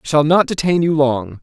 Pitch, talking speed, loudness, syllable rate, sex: 150 Hz, 255 wpm, -15 LUFS, 5.4 syllables/s, male